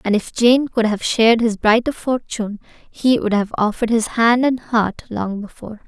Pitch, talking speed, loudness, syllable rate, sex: 225 Hz, 195 wpm, -18 LUFS, 4.9 syllables/s, female